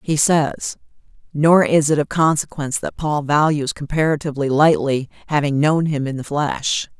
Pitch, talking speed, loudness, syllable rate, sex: 150 Hz, 155 wpm, -18 LUFS, 4.8 syllables/s, female